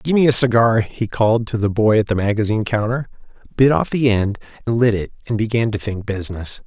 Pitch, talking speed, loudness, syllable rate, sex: 110 Hz, 205 wpm, -18 LUFS, 5.8 syllables/s, male